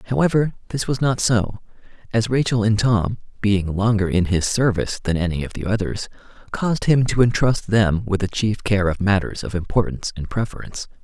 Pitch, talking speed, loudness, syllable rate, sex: 105 Hz, 185 wpm, -20 LUFS, 5.5 syllables/s, male